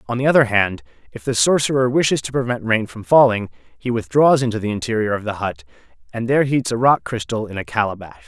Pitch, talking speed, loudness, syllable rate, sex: 115 Hz, 220 wpm, -18 LUFS, 6.2 syllables/s, male